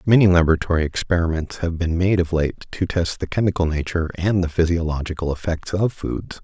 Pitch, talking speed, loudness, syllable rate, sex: 85 Hz, 175 wpm, -21 LUFS, 5.8 syllables/s, male